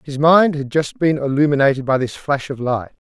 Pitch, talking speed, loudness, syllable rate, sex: 140 Hz, 215 wpm, -17 LUFS, 5.2 syllables/s, male